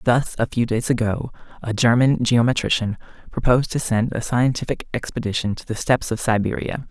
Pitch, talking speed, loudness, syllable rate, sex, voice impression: 115 Hz, 165 wpm, -21 LUFS, 5.6 syllables/s, male, very feminine, slightly gender-neutral, very middle-aged, slightly thin, slightly tensed, slightly weak, bright, very soft, muffled, slightly fluent, raspy, slightly cute, very intellectual, slightly refreshing, very sincere, very calm, very friendly, very reassuring, unique, very elegant, wild, very sweet, lively, very kind, very modest